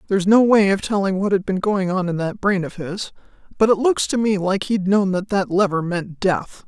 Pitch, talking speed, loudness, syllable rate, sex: 195 Hz, 250 wpm, -19 LUFS, 5.2 syllables/s, female